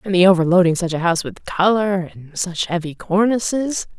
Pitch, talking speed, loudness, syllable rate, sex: 180 Hz, 180 wpm, -18 LUFS, 5.3 syllables/s, female